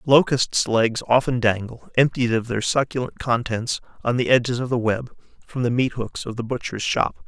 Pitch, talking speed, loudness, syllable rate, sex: 120 Hz, 190 wpm, -22 LUFS, 4.9 syllables/s, male